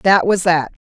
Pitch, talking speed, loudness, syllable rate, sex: 175 Hz, 205 wpm, -15 LUFS, 4.1 syllables/s, female